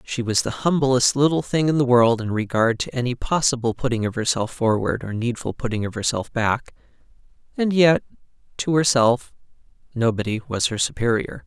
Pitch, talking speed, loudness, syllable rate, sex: 125 Hz, 165 wpm, -21 LUFS, 5.3 syllables/s, male